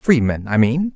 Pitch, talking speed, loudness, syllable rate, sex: 135 Hz, 190 wpm, -17 LUFS, 4.4 syllables/s, male